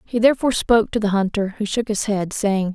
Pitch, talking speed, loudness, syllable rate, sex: 210 Hz, 240 wpm, -20 LUFS, 6.2 syllables/s, female